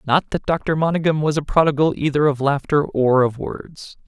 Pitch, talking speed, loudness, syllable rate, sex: 145 Hz, 190 wpm, -19 LUFS, 4.9 syllables/s, male